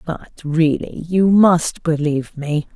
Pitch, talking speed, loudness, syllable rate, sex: 160 Hz, 130 wpm, -17 LUFS, 3.5 syllables/s, female